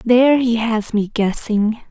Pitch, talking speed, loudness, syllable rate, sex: 225 Hz, 160 wpm, -17 LUFS, 4.1 syllables/s, female